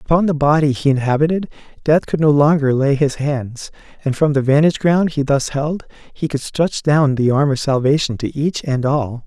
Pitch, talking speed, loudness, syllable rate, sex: 145 Hz, 205 wpm, -17 LUFS, 5.1 syllables/s, male